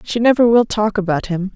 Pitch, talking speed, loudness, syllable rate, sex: 210 Hz, 230 wpm, -16 LUFS, 5.5 syllables/s, female